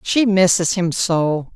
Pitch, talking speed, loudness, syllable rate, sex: 180 Hz, 155 wpm, -17 LUFS, 3.5 syllables/s, female